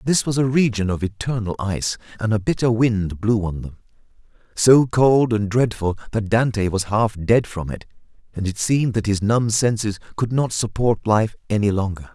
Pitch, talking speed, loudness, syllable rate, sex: 110 Hz, 190 wpm, -20 LUFS, 5.1 syllables/s, male